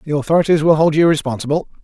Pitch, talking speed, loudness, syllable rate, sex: 155 Hz, 195 wpm, -15 LUFS, 7.6 syllables/s, male